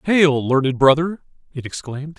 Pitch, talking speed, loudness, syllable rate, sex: 145 Hz, 135 wpm, -18 LUFS, 5.1 syllables/s, male